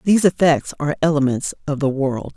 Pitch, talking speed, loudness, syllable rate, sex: 150 Hz, 180 wpm, -19 LUFS, 6.0 syllables/s, female